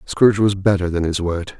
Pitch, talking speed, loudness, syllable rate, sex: 95 Hz, 225 wpm, -18 LUFS, 5.4 syllables/s, male